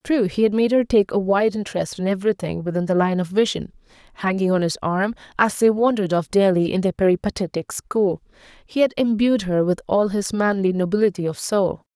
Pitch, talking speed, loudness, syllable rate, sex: 195 Hz, 200 wpm, -20 LUFS, 5.7 syllables/s, female